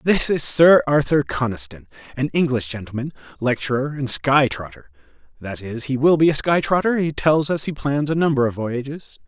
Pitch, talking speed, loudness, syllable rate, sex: 135 Hz, 180 wpm, -19 LUFS, 5.1 syllables/s, male